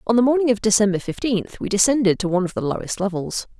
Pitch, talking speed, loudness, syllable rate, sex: 210 Hz, 235 wpm, -20 LUFS, 6.8 syllables/s, female